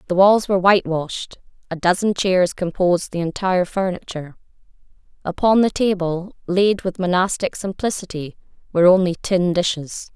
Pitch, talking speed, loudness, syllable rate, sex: 185 Hz, 130 wpm, -19 LUFS, 5.4 syllables/s, female